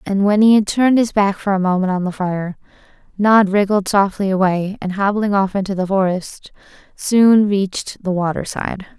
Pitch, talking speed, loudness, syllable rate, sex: 195 Hz, 185 wpm, -16 LUFS, 4.9 syllables/s, female